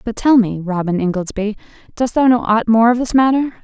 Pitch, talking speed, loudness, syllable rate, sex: 225 Hz, 200 wpm, -15 LUFS, 5.3 syllables/s, female